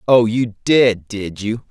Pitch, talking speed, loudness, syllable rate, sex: 110 Hz, 175 wpm, -17 LUFS, 3.3 syllables/s, male